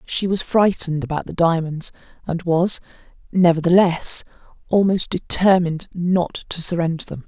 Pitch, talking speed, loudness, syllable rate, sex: 170 Hz, 125 wpm, -19 LUFS, 4.8 syllables/s, female